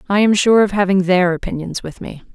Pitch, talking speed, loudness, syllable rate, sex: 190 Hz, 230 wpm, -16 LUFS, 5.7 syllables/s, female